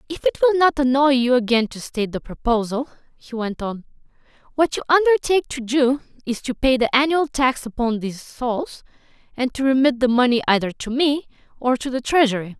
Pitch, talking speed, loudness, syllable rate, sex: 255 Hz, 190 wpm, -20 LUFS, 5.8 syllables/s, female